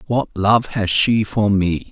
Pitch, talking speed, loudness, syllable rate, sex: 105 Hz, 190 wpm, -17 LUFS, 3.6 syllables/s, male